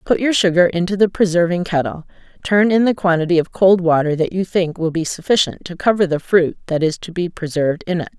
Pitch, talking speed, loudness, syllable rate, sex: 175 Hz, 225 wpm, -17 LUFS, 5.9 syllables/s, female